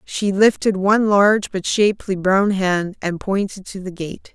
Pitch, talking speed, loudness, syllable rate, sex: 195 Hz, 180 wpm, -18 LUFS, 4.5 syllables/s, female